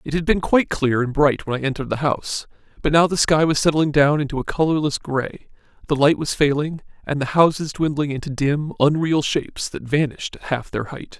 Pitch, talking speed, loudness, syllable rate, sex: 145 Hz, 220 wpm, -20 LUFS, 5.7 syllables/s, male